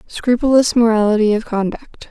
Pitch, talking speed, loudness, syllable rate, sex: 225 Hz, 115 wpm, -15 LUFS, 5.1 syllables/s, female